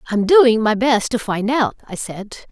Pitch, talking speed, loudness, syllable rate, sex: 230 Hz, 215 wpm, -16 LUFS, 4.3 syllables/s, female